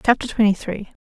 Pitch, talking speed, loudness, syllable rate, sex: 210 Hz, 175 wpm, -20 LUFS, 6.0 syllables/s, female